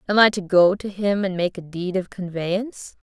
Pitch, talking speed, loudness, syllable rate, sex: 190 Hz, 235 wpm, -21 LUFS, 5.0 syllables/s, female